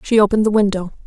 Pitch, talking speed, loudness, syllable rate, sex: 205 Hz, 225 wpm, -16 LUFS, 8.1 syllables/s, female